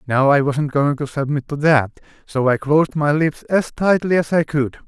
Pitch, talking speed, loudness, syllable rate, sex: 145 Hz, 220 wpm, -18 LUFS, 4.9 syllables/s, male